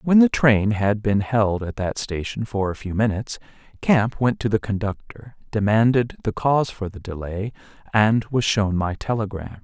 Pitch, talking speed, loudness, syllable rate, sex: 110 Hz, 180 wpm, -22 LUFS, 4.7 syllables/s, male